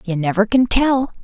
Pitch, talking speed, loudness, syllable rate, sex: 225 Hz, 195 wpm, -16 LUFS, 4.8 syllables/s, female